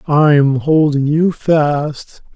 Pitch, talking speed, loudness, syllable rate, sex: 150 Hz, 125 wpm, -14 LUFS, 2.8 syllables/s, male